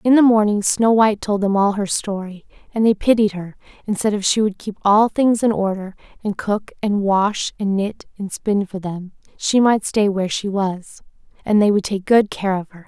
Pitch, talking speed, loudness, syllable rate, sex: 205 Hz, 225 wpm, -18 LUFS, 4.9 syllables/s, female